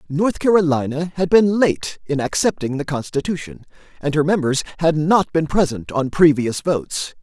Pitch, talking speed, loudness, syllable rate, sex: 155 Hz, 160 wpm, -19 LUFS, 4.8 syllables/s, male